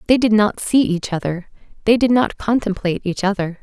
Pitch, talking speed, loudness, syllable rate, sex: 205 Hz, 200 wpm, -18 LUFS, 5.6 syllables/s, female